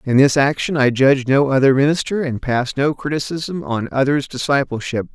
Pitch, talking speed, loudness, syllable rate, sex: 140 Hz, 175 wpm, -17 LUFS, 5.3 syllables/s, male